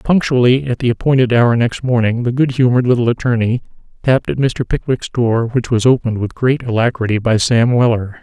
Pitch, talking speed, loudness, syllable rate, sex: 120 Hz, 190 wpm, -15 LUFS, 5.7 syllables/s, male